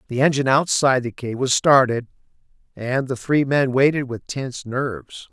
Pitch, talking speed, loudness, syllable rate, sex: 130 Hz, 170 wpm, -20 LUFS, 5.2 syllables/s, male